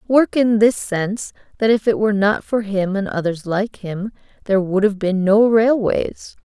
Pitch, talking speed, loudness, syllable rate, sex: 205 Hz, 195 wpm, -18 LUFS, 4.5 syllables/s, female